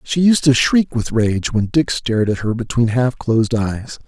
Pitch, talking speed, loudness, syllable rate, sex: 120 Hz, 220 wpm, -17 LUFS, 4.6 syllables/s, male